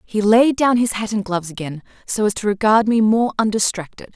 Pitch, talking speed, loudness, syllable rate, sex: 210 Hz, 215 wpm, -17 LUFS, 5.6 syllables/s, female